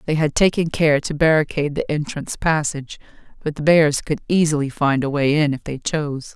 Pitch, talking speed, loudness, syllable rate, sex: 150 Hz, 200 wpm, -19 LUFS, 5.6 syllables/s, female